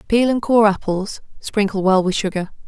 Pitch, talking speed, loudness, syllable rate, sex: 205 Hz, 180 wpm, -18 LUFS, 4.9 syllables/s, female